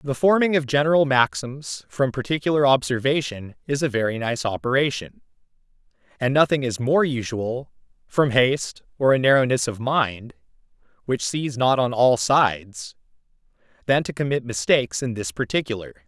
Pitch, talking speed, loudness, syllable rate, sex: 125 Hz, 140 wpm, -21 LUFS, 5.0 syllables/s, male